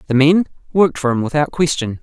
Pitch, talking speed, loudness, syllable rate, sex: 145 Hz, 210 wpm, -16 LUFS, 6.3 syllables/s, male